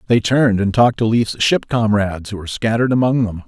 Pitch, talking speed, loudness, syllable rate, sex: 110 Hz, 225 wpm, -16 LUFS, 6.4 syllables/s, male